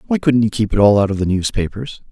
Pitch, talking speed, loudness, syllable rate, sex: 110 Hz, 285 wpm, -16 LUFS, 6.4 syllables/s, male